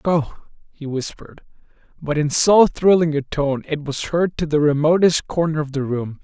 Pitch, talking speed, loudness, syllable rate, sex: 155 Hz, 185 wpm, -19 LUFS, 4.8 syllables/s, male